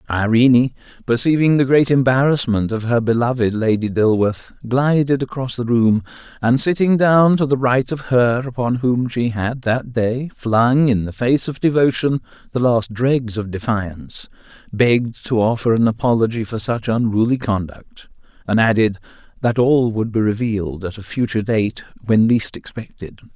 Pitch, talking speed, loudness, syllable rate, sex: 120 Hz, 160 wpm, -17 LUFS, 4.7 syllables/s, male